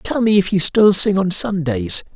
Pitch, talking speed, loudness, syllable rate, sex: 185 Hz, 225 wpm, -16 LUFS, 4.4 syllables/s, male